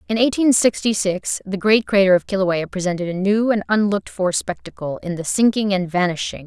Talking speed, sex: 240 wpm, female